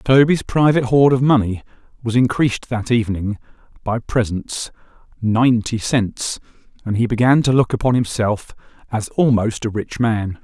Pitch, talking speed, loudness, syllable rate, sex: 115 Hz, 145 wpm, -18 LUFS, 4.8 syllables/s, male